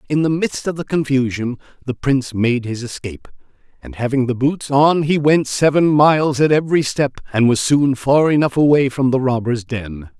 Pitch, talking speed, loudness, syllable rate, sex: 135 Hz, 195 wpm, -17 LUFS, 5.1 syllables/s, male